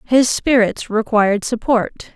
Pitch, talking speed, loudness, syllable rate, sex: 230 Hz, 110 wpm, -16 LUFS, 4.0 syllables/s, female